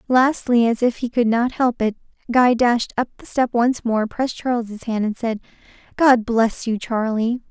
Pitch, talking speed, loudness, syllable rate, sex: 235 Hz, 190 wpm, -19 LUFS, 4.5 syllables/s, female